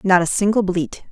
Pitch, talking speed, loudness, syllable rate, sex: 190 Hz, 215 wpm, -18 LUFS, 5.3 syllables/s, female